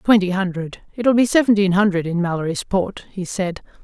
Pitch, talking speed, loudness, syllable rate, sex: 190 Hz, 155 wpm, -19 LUFS, 5.3 syllables/s, female